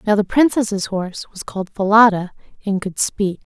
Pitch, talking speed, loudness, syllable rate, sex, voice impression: 200 Hz, 170 wpm, -18 LUFS, 5.1 syllables/s, female, feminine, adult-like, relaxed, weak, soft, calm, friendly, reassuring, kind, modest